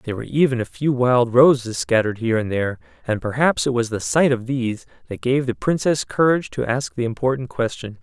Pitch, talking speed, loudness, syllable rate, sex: 120 Hz, 215 wpm, -20 LUFS, 6.1 syllables/s, male